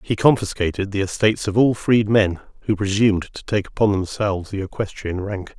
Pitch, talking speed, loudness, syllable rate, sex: 100 Hz, 170 wpm, -20 LUFS, 5.6 syllables/s, male